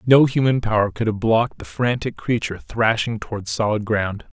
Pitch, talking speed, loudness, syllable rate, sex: 110 Hz, 180 wpm, -20 LUFS, 5.3 syllables/s, male